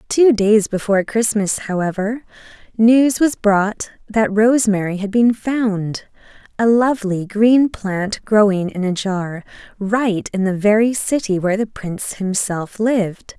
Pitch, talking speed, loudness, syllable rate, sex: 210 Hz, 140 wpm, -17 LUFS, 4.1 syllables/s, female